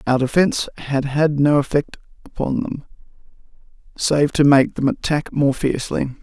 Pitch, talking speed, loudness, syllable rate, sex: 140 Hz, 145 wpm, -19 LUFS, 4.8 syllables/s, male